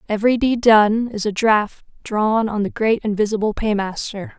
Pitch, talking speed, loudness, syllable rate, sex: 215 Hz, 165 wpm, -18 LUFS, 4.7 syllables/s, female